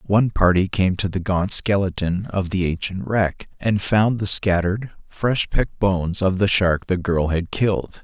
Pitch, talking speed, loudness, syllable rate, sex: 95 Hz, 185 wpm, -21 LUFS, 4.5 syllables/s, male